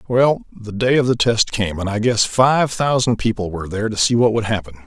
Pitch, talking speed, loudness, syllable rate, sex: 115 Hz, 245 wpm, -18 LUFS, 5.6 syllables/s, male